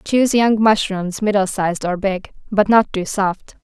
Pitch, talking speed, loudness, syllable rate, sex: 200 Hz, 180 wpm, -17 LUFS, 4.5 syllables/s, female